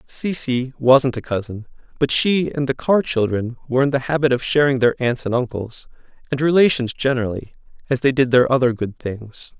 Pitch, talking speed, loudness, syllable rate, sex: 130 Hz, 190 wpm, -19 LUFS, 5.2 syllables/s, male